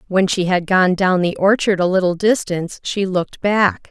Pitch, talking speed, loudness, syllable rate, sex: 190 Hz, 200 wpm, -17 LUFS, 4.9 syllables/s, female